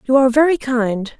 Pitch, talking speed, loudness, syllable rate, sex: 255 Hz, 200 wpm, -16 LUFS, 5.8 syllables/s, female